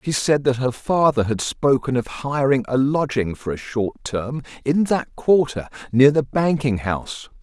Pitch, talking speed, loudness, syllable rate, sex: 135 Hz, 180 wpm, -20 LUFS, 4.4 syllables/s, male